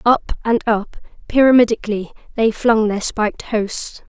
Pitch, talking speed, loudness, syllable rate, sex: 220 Hz, 130 wpm, -17 LUFS, 4.7 syllables/s, female